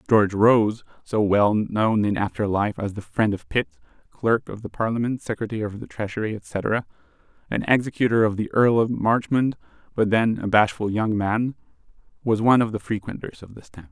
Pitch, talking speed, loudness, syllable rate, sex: 110 Hz, 185 wpm, -22 LUFS, 5.4 syllables/s, male